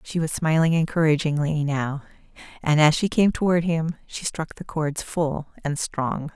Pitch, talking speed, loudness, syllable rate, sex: 155 Hz, 170 wpm, -23 LUFS, 4.5 syllables/s, female